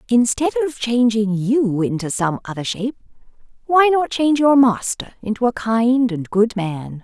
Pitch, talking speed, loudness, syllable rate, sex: 230 Hz, 160 wpm, -18 LUFS, 4.5 syllables/s, female